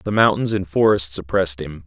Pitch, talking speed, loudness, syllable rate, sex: 90 Hz, 195 wpm, -19 LUFS, 5.5 syllables/s, male